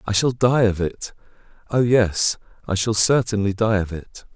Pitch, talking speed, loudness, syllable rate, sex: 105 Hz, 180 wpm, -20 LUFS, 4.5 syllables/s, male